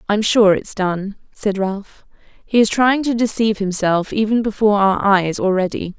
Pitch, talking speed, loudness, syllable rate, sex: 205 Hz, 180 wpm, -17 LUFS, 4.9 syllables/s, female